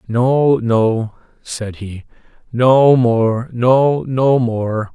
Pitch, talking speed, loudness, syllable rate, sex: 120 Hz, 110 wpm, -15 LUFS, 2.2 syllables/s, male